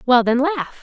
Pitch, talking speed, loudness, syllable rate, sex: 265 Hz, 220 wpm, -17 LUFS, 4.4 syllables/s, female